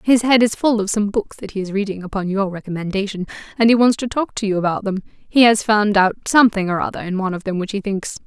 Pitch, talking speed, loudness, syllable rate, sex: 210 Hz, 270 wpm, -18 LUFS, 6.5 syllables/s, female